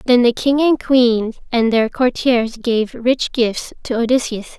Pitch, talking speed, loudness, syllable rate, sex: 240 Hz, 170 wpm, -16 LUFS, 3.9 syllables/s, female